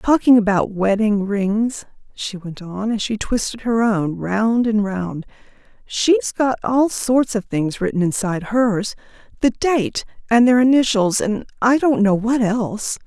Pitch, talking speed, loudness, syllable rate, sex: 220 Hz, 155 wpm, -18 LUFS, 4.1 syllables/s, female